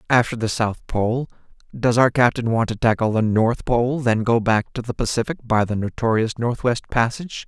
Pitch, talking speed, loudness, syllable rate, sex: 115 Hz, 195 wpm, -20 LUFS, 5.1 syllables/s, male